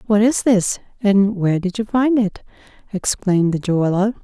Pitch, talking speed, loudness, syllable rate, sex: 200 Hz, 170 wpm, -18 LUFS, 5.2 syllables/s, female